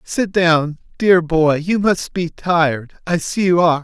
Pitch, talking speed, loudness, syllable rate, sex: 170 Hz, 190 wpm, -17 LUFS, 4.0 syllables/s, male